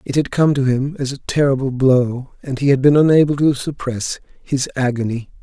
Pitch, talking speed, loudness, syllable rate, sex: 135 Hz, 200 wpm, -17 LUFS, 5.1 syllables/s, male